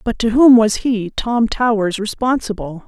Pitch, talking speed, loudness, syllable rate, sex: 225 Hz, 165 wpm, -16 LUFS, 4.4 syllables/s, female